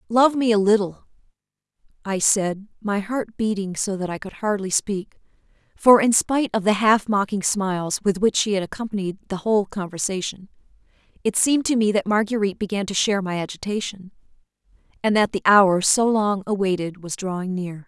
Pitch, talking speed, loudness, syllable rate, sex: 200 Hz, 175 wpm, -21 LUFS, 5.4 syllables/s, female